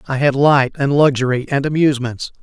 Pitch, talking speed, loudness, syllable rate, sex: 135 Hz, 175 wpm, -16 LUFS, 5.6 syllables/s, male